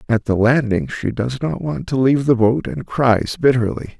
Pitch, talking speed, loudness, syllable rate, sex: 120 Hz, 210 wpm, -18 LUFS, 5.0 syllables/s, male